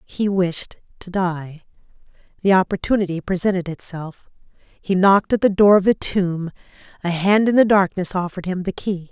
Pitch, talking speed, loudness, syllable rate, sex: 185 Hz, 165 wpm, -19 LUFS, 5.0 syllables/s, female